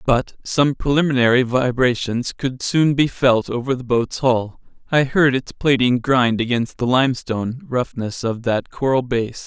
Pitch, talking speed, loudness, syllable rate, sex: 125 Hz, 160 wpm, -19 LUFS, 4.4 syllables/s, male